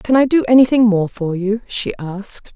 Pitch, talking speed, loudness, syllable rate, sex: 215 Hz, 210 wpm, -16 LUFS, 4.9 syllables/s, female